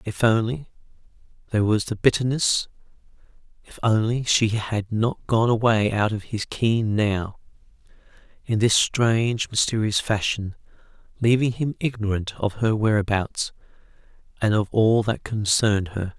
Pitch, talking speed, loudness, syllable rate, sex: 110 Hz, 120 wpm, -22 LUFS, 4.5 syllables/s, male